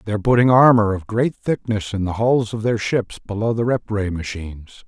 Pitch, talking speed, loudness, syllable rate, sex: 110 Hz, 210 wpm, -19 LUFS, 5.1 syllables/s, male